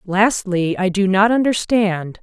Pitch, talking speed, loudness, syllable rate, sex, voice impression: 200 Hz, 135 wpm, -17 LUFS, 3.8 syllables/s, female, feminine, adult-like, tensed, powerful, bright, clear, fluent, intellectual, calm, friendly, elegant, lively, slightly sharp